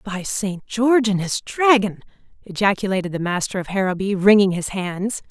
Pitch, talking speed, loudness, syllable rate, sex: 200 Hz, 160 wpm, -20 LUFS, 5.1 syllables/s, female